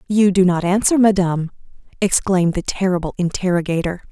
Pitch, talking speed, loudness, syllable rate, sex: 185 Hz, 130 wpm, -17 LUFS, 6.0 syllables/s, female